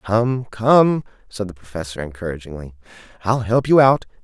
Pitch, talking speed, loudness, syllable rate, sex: 105 Hz, 140 wpm, -19 LUFS, 5.0 syllables/s, male